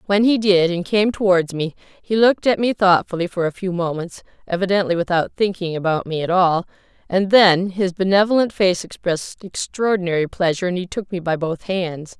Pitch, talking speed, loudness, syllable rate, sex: 185 Hz, 185 wpm, -19 LUFS, 5.3 syllables/s, female